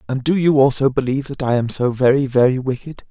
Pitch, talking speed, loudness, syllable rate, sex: 135 Hz, 230 wpm, -17 LUFS, 6.2 syllables/s, male